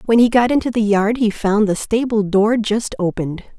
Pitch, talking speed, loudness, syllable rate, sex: 215 Hz, 220 wpm, -17 LUFS, 5.2 syllables/s, female